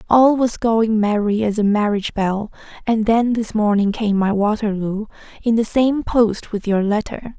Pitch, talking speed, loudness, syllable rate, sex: 215 Hz, 180 wpm, -18 LUFS, 4.5 syllables/s, female